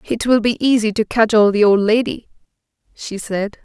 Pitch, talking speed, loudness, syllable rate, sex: 220 Hz, 180 wpm, -16 LUFS, 5.2 syllables/s, female